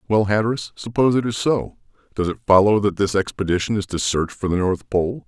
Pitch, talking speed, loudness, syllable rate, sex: 100 Hz, 215 wpm, -20 LUFS, 5.9 syllables/s, male